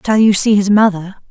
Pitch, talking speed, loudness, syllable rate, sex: 200 Hz, 230 wpm, -12 LUFS, 5.8 syllables/s, female